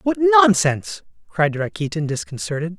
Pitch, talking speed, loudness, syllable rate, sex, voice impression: 160 Hz, 110 wpm, -19 LUFS, 5.4 syllables/s, male, masculine, adult-like, relaxed, hard, fluent, raspy, cool, sincere, friendly, wild, lively, kind